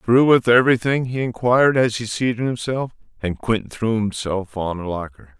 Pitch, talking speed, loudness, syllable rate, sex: 115 Hz, 180 wpm, -20 LUFS, 5.2 syllables/s, male